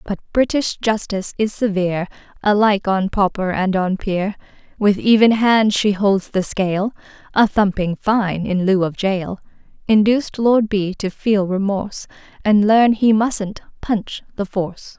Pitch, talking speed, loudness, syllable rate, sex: 200 Hz, 150 wpm, -18 LUFS, 4.4 syllables/s, female